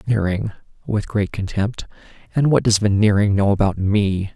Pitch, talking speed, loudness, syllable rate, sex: 105 Hz, 150 wpm, -19 LUFS, 5.0 syllables/s, male